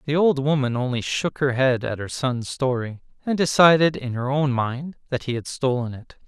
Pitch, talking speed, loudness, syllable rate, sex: 135 Hz, 210 wpm, -22 LUFS, 4.9 syllables/s, male